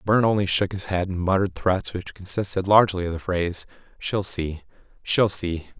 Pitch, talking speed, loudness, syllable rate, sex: 95 Hz, 195 wpm, -23 LUFS, 5.7 syllables/s, male